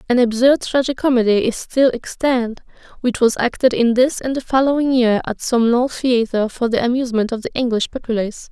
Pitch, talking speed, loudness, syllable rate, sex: 245 Hz, 185 wpm, -17 LUFS, 5.5 syllables/s, female